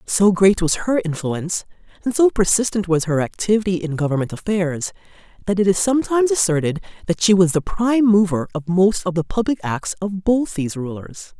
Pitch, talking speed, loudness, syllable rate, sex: 185 Hz, 185 wpm, -19 LUFS, 5.6 syllables/s, female